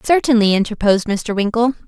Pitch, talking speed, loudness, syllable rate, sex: 225 Hz, 130 wpm, -16 LUFS, 6.0 syllables/s, female